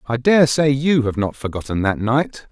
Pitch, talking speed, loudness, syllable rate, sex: 125 Hz, 215 wpm, -18 LUFS, 4.7 syllables/s, male